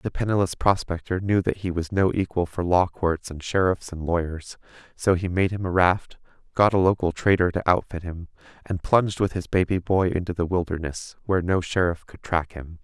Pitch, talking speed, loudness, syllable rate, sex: 90 Hz, 205 wpm, -24 LUFS, 5.3 syllables/s, male